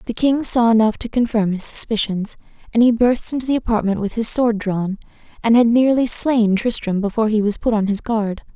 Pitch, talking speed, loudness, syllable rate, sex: 225 Hz, 210 wpm, -18 LUFS, 5.4 syllables/s, female